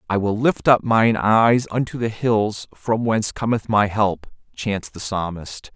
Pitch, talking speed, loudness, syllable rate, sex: 110 Hz, 175 wpm, -20 LUFS, 4.0 syllables/s, male